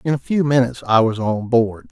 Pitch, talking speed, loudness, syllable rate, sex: 125 Hz, 250 wpm, -18 LUFS, 5.5 syllables/s, male